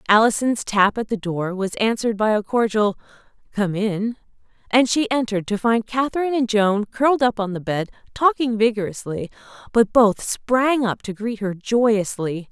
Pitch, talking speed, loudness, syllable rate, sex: 220 Hz, 170 wpm, -20 LUFS, 4.9 syllables/s, female